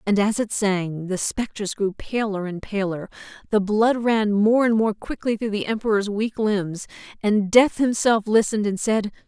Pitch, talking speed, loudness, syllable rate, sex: 210 Hz, 180 wpm, -22 LUFS, 4.5 syllables/s, female